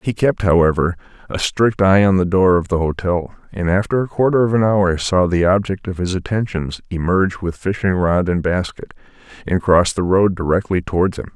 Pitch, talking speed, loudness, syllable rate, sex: 95 Hz, 200 wpm, -17 LUFS, 5.3 syllables/s, male